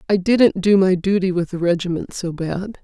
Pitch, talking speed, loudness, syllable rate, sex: 185 Hz, 210 wpm, -18 LUFS, 5.0 syllables/s, female